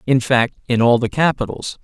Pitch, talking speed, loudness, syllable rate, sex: 125 Hz, 195 wpm, -17 LUFS, 5.2 syllables/s, male